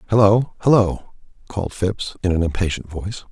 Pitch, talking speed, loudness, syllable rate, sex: 100 Hz, 145 wpm, -20 LUFS, 5.6 syllables/s, male